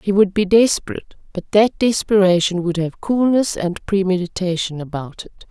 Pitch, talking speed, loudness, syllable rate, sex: 190 Hz, 155 wpm, -18 LUFS, 5.0 syllables/s, female